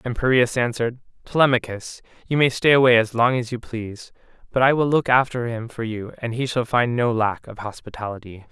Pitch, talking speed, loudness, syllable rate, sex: 120 Hz, 205 wpm, -21 LUFS, 5.7 syllables/s, male